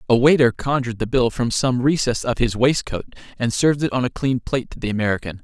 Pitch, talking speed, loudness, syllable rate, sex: 125 Hz, 230 wpm, -20 LUFS, 6.3 syllables/s, male